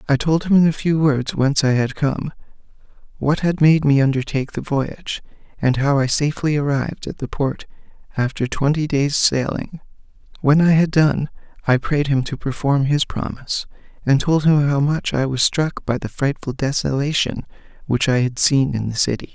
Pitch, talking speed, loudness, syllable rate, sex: 140 Hz, 185 wpm, -19 LUFS, 5.1 syllables/s, male